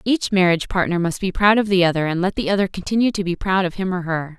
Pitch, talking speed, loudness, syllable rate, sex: 185 Hz, 285 wpm, -19 LUFS, 6.6 syllables/s, female